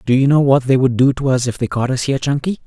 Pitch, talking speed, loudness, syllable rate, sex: 135 Hz, 340 wpm, -16 LUFS, 6.8 syllables/s, male